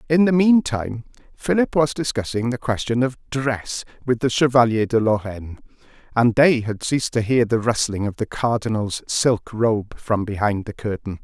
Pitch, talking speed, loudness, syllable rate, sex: 120 Hz, 170 wpm, -20 LUFS, 4.8 syllables/s, male